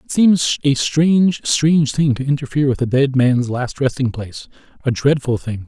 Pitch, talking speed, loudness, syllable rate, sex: 135 Hz, 180 wpm, -17 LUFS, 5.1 syllables/s, male